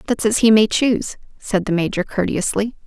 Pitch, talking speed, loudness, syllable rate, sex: 210 Hz, 190 wpm, -18 LUFS, 5.4 syllables/s, female